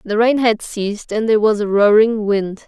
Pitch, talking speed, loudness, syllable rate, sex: 215 Hz, 225 wpm, -16 LUFS, 5.1 syllables/s, female